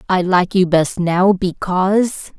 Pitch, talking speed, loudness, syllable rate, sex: 185 Hz, 150 wpm, -16 LUFS, 3.7 syllables/s, female